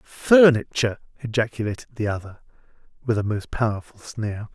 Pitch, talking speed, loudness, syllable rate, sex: 115 Hz, 120 wpm, -22 LUFS, 5.2 syllables/s, male